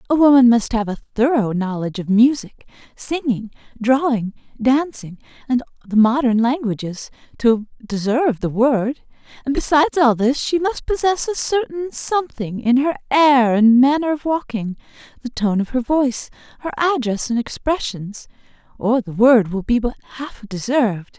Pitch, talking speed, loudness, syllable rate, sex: 250 Hz, 155 wpm, -18 LUFS, 4.8 syllables/s, female